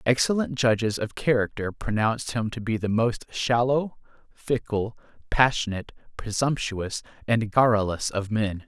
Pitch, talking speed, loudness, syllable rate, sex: 110 Hz, 125 wpm, -25 LUFS, 4.6 syllables/s, male